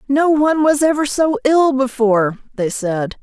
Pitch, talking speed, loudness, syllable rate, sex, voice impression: 270 Hz, 165 wpm, -16 LUFS, 4.6 syllables/s, female, feminine, very adult-like, slightly intellectual, slightly unique, slightly elegant